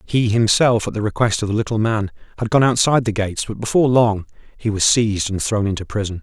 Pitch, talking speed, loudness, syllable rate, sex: 110 Hz, 230 wpm, -18 LUFS, 6.4 syllables/s, male